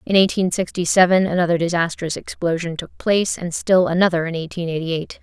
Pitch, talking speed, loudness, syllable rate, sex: 175 Hz, 185 wpm, -19 LUFS, 5.9 syllables/s, female